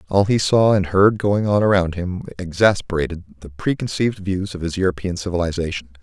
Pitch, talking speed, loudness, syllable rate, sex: 95 Hz, 170 wpm, -19 LUFS, 5.8 syllables/s, male